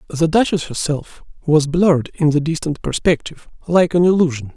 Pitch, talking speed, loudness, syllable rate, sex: 160 Hz, 160 wpm, -17 LUFS, 5.4 syllables/s, male